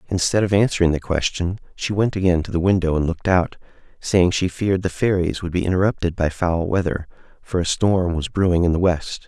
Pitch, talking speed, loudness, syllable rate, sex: 90 Hz, 215 wpm, -20 LUFS, 5.7 syllables/s, male